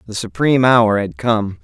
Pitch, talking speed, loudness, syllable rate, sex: 110 Hz, 185 wpm, -15 LUFS, 4.8 syllables/s, male